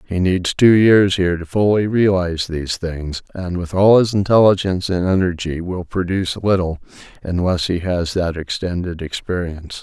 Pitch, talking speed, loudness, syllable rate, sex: 90 Hz, 160 wpm, -18 LUFS, 5.1 syllables/s, male